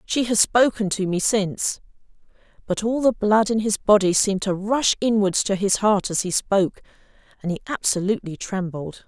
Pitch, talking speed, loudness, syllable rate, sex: 205 Hz, 180 wpm, -21 LUFS, 5.1 syllables/s, female